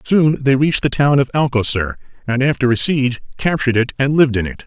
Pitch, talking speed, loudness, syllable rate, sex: 130 Hz, 220 wpm, -16 LUFS, 6.2 syllables/s, male